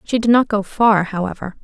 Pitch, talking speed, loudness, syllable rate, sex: 210 Hz, 220 wpm, -17 LUFS, 5.4 syllables/s, female